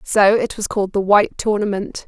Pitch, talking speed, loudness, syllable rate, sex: 205 Hz, 200 wpm, -17 LUFS, 5.6 syllables/s, female